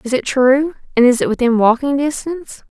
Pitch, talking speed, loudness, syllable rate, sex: 265 Hz, 180 wpm, -15 LUFS, 5.5 syllables/s, female